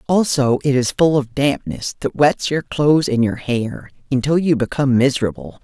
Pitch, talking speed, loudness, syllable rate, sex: 140 Hz, 180 wpm, -18 LUFS, 5.1 syllables/s, female